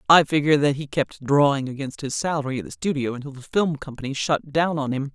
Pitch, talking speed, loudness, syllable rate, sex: 140 Hz, 235 wpm, -23 LUFS, 6.1 syllables/s, female